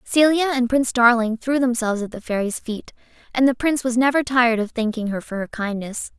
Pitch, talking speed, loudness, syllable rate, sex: 240 Hz, 215 wpm, -20 LUFS, 5.9 syllables/s, female